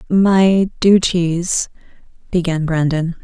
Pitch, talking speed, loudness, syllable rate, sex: 175 Hz, 75 wpm, -16 LUFS, 3.1 syllables/s, female